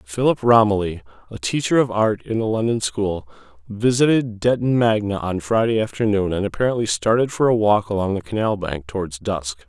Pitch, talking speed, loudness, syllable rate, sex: 105 Hz, 175 wpm, -20 LUFS, 5.3 syllables/s, male